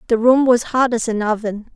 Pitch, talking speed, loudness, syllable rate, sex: 230 Hz, 240 wpm, -17 LUFS, 5.2 syllables/s, female